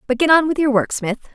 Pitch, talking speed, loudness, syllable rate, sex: 265 Hz, 315 wpm, -17 LUFS, 6.5 syllables/s, female